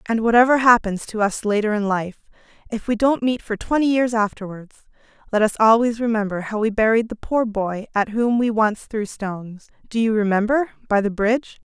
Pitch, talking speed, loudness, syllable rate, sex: 220 Hz, 195 wpm, -20 LUFS, 5.4 syllables/s, female